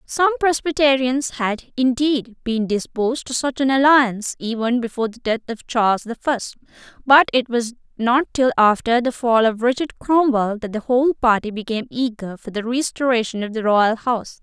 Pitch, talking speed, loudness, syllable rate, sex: 245 Hz, 175 wpm, -19 LUFS, 5.1 syllables/s, female